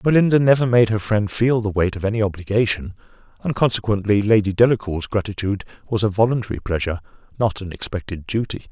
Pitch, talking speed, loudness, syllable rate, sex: 105 Hz, 160 wpm, -20 LUFS, 6.4 syllables/s, male